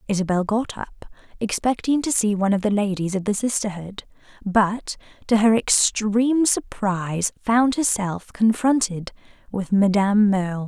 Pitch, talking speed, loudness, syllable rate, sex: 210 Hz, 135 wpm, -21 LUFS, 4.7 syllables/s, female